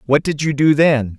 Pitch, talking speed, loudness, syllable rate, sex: 145 Hz, 255 wpm, -15 LUFS, 4.8 syllables/s, male